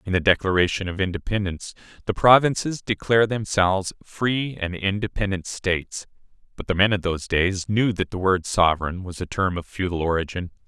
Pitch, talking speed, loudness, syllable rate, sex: 95 Hz, 170 wpm, -22 LUFS, 5.6 syllables/s, male